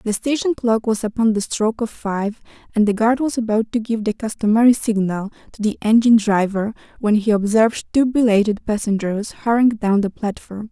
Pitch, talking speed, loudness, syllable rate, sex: 220 Hz, 185 wpm, -18 LUFS, 5.3 syllables/s, female